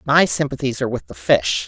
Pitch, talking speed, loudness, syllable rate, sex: 140 Hz, 215 wpm, -19 LUFS, 5.7 syllables/s, female